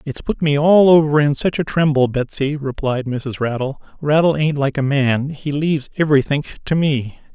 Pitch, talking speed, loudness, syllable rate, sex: 145 Hz, 190 wpm, -17 LUFS, 5.0 syllables/s, male